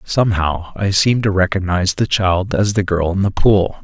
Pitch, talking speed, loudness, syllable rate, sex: 95 Hz, 205 wpm, -16 LUFS, 5.2 syllables/s, male